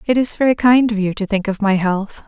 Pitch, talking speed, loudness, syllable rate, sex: 215 Hz, 290 wpm, -16 LUFS, 5.6 syllables/s, female